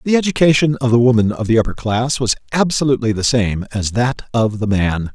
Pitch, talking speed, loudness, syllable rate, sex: 120 Hz, 210 wpm, -16 LUFS, 5.7 syllables/s, male